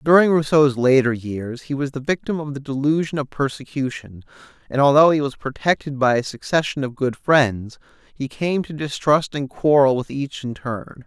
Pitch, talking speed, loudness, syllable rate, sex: 140 Hz, 185 wpm, -20 LUFS, 4.9 syllables/s, male